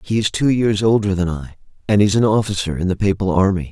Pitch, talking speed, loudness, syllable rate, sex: 100 Hz, 240 wpm, -17 LUFS, 6.2 syllables/s, male